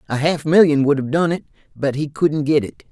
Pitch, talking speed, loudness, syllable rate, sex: 150 Hz, 245 wpm, -18 LUFS, 5.4 syllables/s, male